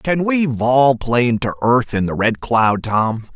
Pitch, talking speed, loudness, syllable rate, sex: 125 Hz, 195 wpm, -17 LUFS, 3.8 syllables/s, male